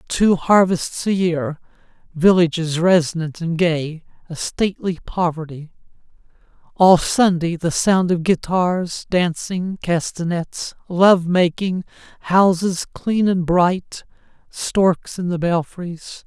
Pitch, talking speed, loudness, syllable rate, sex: 175 Hz, 105 wpm, -18 LUFS, 3.5 syllables/s, male